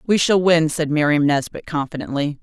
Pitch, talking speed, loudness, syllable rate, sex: 155 Hz, 175 wpm, -19 LUFS, 5.2 syllables/s, female